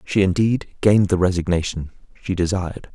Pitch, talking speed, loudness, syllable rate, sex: 95 Hz, 145 wpm, -20 LUFS, 5.6 syllables/s, male